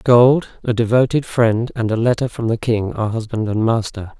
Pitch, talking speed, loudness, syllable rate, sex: 115 Hz, 200 wpm, -17 LUFS, 4.9 syllables/s, male